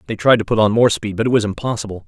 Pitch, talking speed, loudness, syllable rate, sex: 110 Hz, 320 wpm, -17 LUFS, 7.4 syllables/s, male